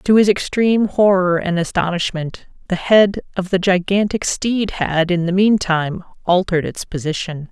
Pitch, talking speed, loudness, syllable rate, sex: 185 Hz, 150 wpm, -17 LUFS, 4.8 syllables/s, female